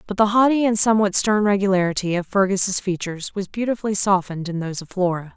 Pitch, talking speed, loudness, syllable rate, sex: 195 Hz, 190 wpm, -20 LUFS, 6.5 syllables/s, female